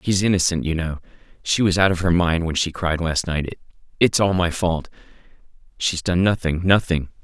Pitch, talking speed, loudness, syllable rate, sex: 85 Hz, 190 wpm, -20 LUFS, 5.1 syllables/s, male